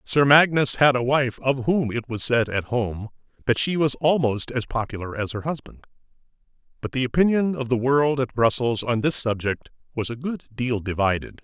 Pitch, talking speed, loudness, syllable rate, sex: 125 Hz, 195 wpm, -22 LUFS, 5.0 syllables/s, male